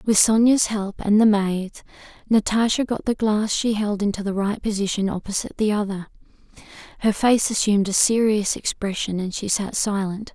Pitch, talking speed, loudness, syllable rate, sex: 210 Hz, 170 wpm, -21 LUFS, 5.1 syllables/s, female